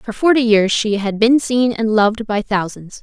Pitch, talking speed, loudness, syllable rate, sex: 220 Hz, 220 wpm, -16 LUFS, 4.7 syllables/s, female